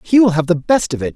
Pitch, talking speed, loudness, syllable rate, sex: 175 Hz, 365 wpm, -15 LUFS, 6.4 syllables/s, male